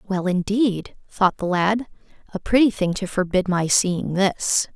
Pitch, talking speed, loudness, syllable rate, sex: 195 Hz, 165 wpm, -21 LUFS, 4.0 syllables/s, female